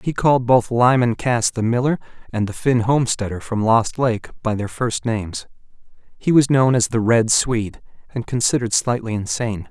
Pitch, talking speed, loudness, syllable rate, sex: 115 Hz, 180 wpm, -19 LUFS, 5.2 syllables/s, male